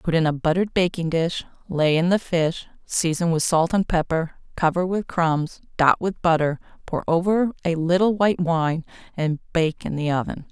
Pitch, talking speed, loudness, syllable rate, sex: 170 Hz, 185 wpm, -22 LUFS, 4.8 syllables/s, female